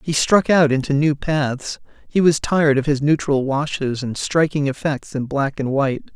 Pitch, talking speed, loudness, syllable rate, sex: 145 Hz, 195 wpm, -19 LUFS, 4.8 syllables/s, male